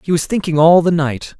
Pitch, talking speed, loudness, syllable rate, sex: 165 Hz, 260 wpm, -14 LUFS, 5.5 syllables/s, male